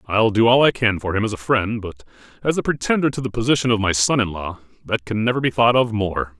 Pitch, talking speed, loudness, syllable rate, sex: 110 Hz, 270 wpm, -19 LUFS, 6.2 syllables/s, male